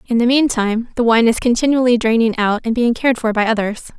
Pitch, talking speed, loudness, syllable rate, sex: 235 Hz, 225 wpm, -16 LUFS, 6.2 syllables/s, female